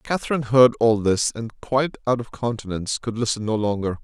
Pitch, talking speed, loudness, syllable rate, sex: 115 Hz, 195 wpm, -21 LUFS, 6.0 syllables/s, male